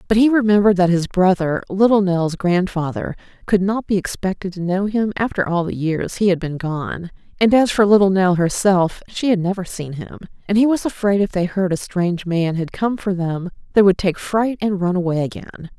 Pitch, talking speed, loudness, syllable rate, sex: 190 Hz, 215 wpm, -18 LUFS, 5.2 syllables/s, female